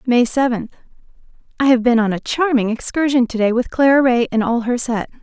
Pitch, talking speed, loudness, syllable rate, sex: 245 Hz, 195 wpm, -17 LUFS, 5.6 syllables/s, female